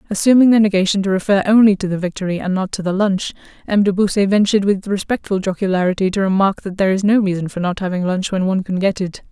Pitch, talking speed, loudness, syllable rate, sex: 195 Hz, 240 wpm, -17 LUFS, 6.8 syllables/s, female